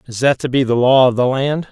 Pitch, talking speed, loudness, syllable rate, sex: 130 Hz, 315 wpm, -15 LUFS, 5.8 syllables/s, male